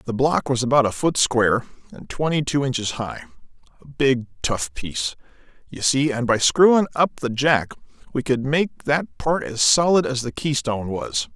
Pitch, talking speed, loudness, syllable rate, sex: 130 Hz, 185 wpm, -21 LUFS, 4.7 syllables/s, male